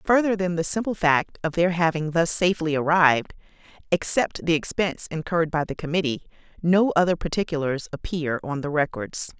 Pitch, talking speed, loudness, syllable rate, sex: 165 Hz, 160 wpm, -23 LUFS, 5.6 syllables/s, female